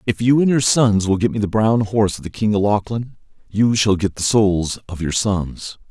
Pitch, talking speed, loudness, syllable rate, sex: 105 Hz, 245 wpm, -18 LUFS, 4.9 syllables/s, male